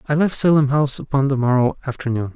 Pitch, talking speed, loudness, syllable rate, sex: 135 Hz, 205 wpm, -18 LUFS, 6.5 syllables/s, male